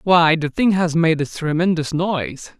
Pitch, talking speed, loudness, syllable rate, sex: 165 Hz, 185 wpm, -18 LUFS, 4.4 syllables/s, male